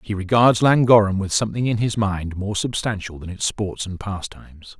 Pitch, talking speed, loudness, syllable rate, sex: 105 Hz, 190 wpm, -20 LUFS, 5.1 syllables/s, male